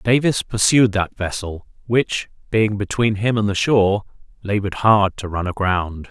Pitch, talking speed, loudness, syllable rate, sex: 105 Hz, 155 wpm, -19 LUFS, 4.6 syllables/s, male